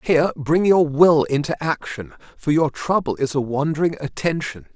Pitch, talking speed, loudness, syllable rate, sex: 155 Hz, 165 wpm, -20 LUFS, 4.9 syllables/s, male